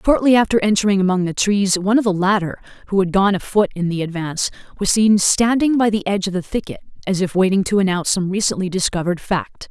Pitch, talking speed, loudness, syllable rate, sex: 195 Hz, 215 wpm, -18 LUFS, 6.4 syllables/s, female